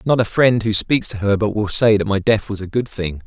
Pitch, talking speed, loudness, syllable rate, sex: 105 Hz, 310 wpm, -18 LUFS, 5.4 syllables/s, male